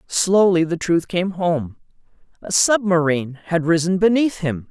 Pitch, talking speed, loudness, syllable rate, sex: 180 Hz, 140 wpm, -18 LUFS, 4.4 syllables/s, female